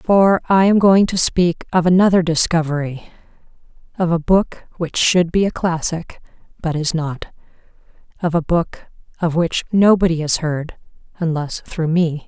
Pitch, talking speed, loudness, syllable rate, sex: 170 Hz, 150 wpm, -17 LUFS, 4.5 syllables/s, female